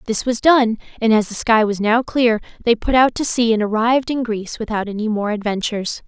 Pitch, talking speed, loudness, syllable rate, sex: 225 Hz, 225 wpm, -18 LUFS, 5.7 syllables/s, female